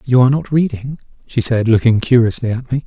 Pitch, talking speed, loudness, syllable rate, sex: 125 Hz, 210 wpm, -15 LUFS, 5.9 syllables/s, male